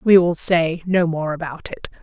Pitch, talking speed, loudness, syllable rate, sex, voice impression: 165 Hz, 205 wpm, -19 LUFS, 4.3 syllables/s, female, very feminine, very adult-like, very middle-aged, slightly thin, tensed, powerful, dark, very hard, slightly muffled, very fluent, slightly raspy, cool, intellectual, slightly refreshing, slightly sincere, slightly calm, slightly friendly, slightly reassuring, unique, slightly elegant, wild, very lively, very strict, intense, sharp, light